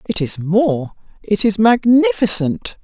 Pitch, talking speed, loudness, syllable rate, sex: 200 Hz, 105 wpm, -16 LUFS, 3.7 syllables/s, female